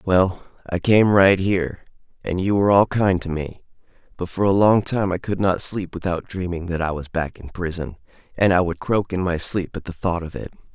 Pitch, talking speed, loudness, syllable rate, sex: 90 Hz, 230 wpm, -21 LUFS, 5.2 syllables/s, male